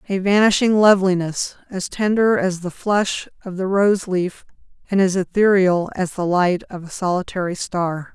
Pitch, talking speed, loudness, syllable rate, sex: 185 Hz, 160 wpm, -19 LUFS, 4.6 syllables/s, female